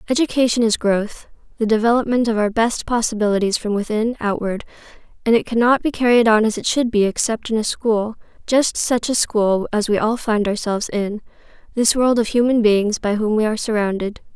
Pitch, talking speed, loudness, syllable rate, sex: 220 Hz, 190 wpm, -18 LUFS, 5.5 syllables/s, female